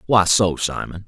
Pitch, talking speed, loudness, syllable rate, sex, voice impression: 95 Hz, 165 wpm, -18 LUFS, 4.4 syllables/s, male, masculine, adult-like, slightly thick, slightly refreshing, slightly unique